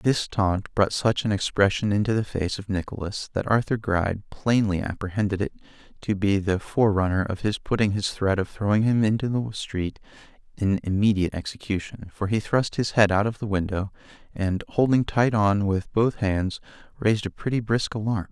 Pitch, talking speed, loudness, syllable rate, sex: 105 Hz, 185 wpm, -24 LUFS, 5.2 syllables/s, male